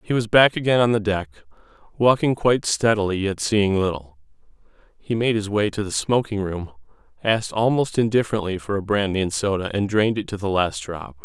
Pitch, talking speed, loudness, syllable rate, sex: 105 Hz, 190 wpm, -21 LUFS, 5.7 syllables/s, male